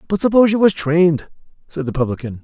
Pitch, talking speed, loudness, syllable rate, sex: 165 Hz, 195 wpm, -16 LUFS, 6.9 syllables/s, male